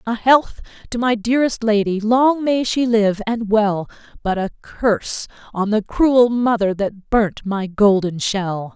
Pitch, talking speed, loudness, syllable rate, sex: 215 Hz, 165 wpm, -18 LUFS, 4.0 syllables/s, female